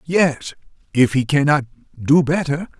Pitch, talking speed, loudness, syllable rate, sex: 145 Hz, 130 wpm, -18 LUFS, 4.1 syllables/s, male